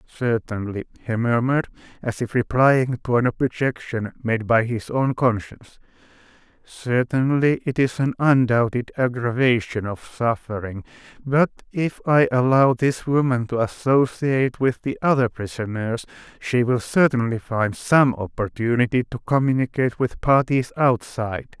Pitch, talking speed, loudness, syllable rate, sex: 125 Hz, 125 wpm, -21 LUFS, 4.6 syllables/s, male